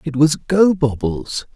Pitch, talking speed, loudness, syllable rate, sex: 140 Hz, 115 wpm, -17 LUFS, 3.6 syllables/s, male